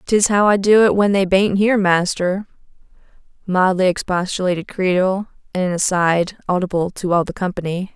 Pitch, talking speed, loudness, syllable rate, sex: 190 Hz, 160 wpm, -17 LUFS, 5.4 syllables/s, female